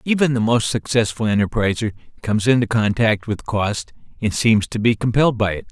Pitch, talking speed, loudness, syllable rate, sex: 115 Hz, 180 wpm, -19 LUFS, 5.6 syllables/s, male